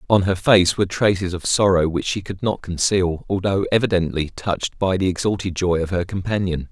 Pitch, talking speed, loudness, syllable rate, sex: 95 Hz, 195 wpm, -20 LUFS, 5.4 syllables/s, male